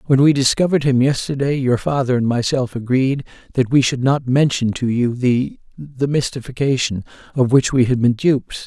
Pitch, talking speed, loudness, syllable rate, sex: 130 Hz, 175 wpm, -17 LUFS, 5.2 syllables/s, male